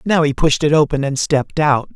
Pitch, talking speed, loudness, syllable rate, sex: 145 Hz, 245 wpm, -16 LUFS, 5.5 syllables/s, male